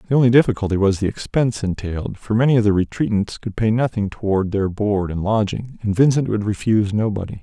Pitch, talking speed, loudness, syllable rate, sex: 105 Hz, 200 wpm, -19 LUFS, 6.1 syllables/s, male